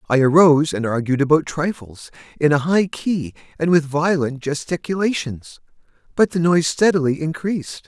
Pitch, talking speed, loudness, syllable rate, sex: 155 Hz, 145 wpm, -19 LUFS, 5.2 syllables/s, male